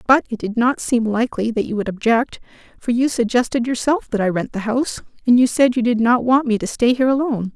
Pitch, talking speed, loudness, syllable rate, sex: 235 Hz, 245 wpm, -18 LUFS, 6.1 syllables/s, female